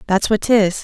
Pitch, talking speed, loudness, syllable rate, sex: 205 Hz, 215 wpm, -16 LUFS, 4.6 syllables/s, female